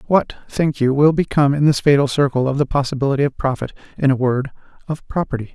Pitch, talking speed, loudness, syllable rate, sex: 140 Hz, 195 wpm, -18 LUFS, 6.5 syllables/s, male